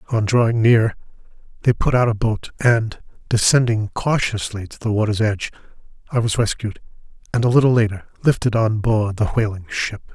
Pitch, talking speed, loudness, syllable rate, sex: 110 Hz, 165 wpm, -19 LUFS, 5.2 syllables/s, male